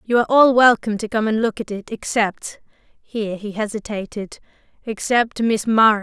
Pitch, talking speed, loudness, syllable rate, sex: 220 Hz, 160 wpm, -19 LUFS, 5.2 syllables/s, female